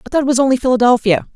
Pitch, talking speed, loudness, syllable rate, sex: 250 Hz, 265 wpm, -14 LUFS, 8.6 syllables/s, female